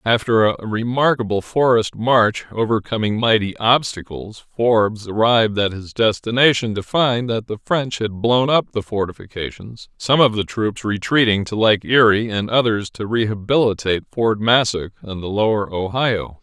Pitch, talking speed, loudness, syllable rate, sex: 110 Hz, 150 wpm, -18 LUFS, 4.7 syllables/s, male